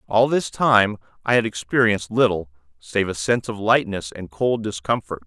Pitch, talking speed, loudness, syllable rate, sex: 105 Hz, 170 wpm, -21 LUFS, 5.1 syllables/s, male